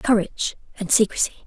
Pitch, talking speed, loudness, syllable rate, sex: 210 Hz, 125 wpm, -21 LUFS, 6.5 syllables/s, female